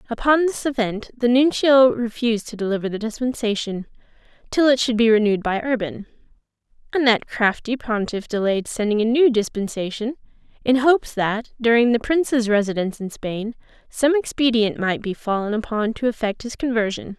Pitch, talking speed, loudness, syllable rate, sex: 230 Hz, 155 wpm, -20 LUFS, 5.4 syllables/s, female